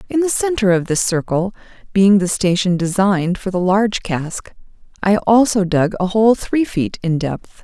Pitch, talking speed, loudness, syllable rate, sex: 195 Hz, 180 wpm, -17 LUFS, 4.6 syllables/s, female